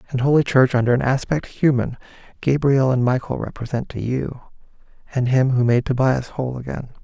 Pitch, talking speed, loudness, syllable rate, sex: 130 Hz, 170 wpm, -20 LUFS, 5.5 syllables/s, male